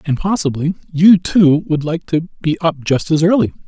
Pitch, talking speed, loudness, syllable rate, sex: 160 Hz, 165 wpm, -15 LUFS, 4.9 syllables/s, male